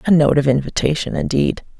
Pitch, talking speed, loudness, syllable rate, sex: 155 Hz, 170 wpm, -17 LUFS, 5.7 syllables/s, female